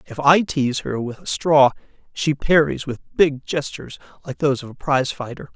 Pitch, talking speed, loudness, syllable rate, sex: 140 Hz, 195 wpm, -20 LUFS, 5.3 syllables/s, male